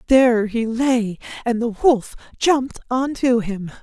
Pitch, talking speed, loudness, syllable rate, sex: 240 Hz, 155 wpm, -19 LUFS, 4.1 syllables/s, female